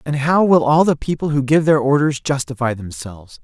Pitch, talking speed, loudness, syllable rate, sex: 140 Hz, 210 wpm, -16 LUFS, 5.4 syllables/s, male